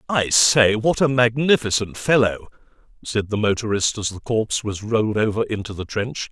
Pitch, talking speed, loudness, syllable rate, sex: 110 Hz, 170 wpm, -20 LUFS, 5.0 syllables/s, male